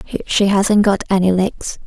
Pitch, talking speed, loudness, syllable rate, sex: 200 Hz, 160 wpm, -15 LUFS, 5.0 syllables/s, female